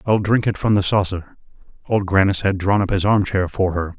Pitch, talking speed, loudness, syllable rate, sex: 95 Hz, 225 wpm, -19 LUFS, 5.4 syllables/s, male